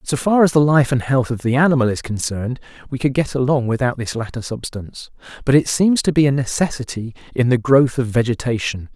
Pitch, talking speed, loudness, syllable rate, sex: 130 Hz, 215 wpm, -18 LUFS, 5.9 syllables/s, male